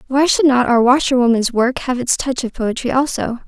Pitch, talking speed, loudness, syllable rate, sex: 250 Hz, 205 wpm, -16 LUFS, 5.3 syllables/s, female